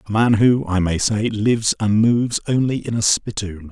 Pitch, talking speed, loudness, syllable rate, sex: 110 Hz, 210 wpm, -18 LUFS, 5.0 syllables/s, male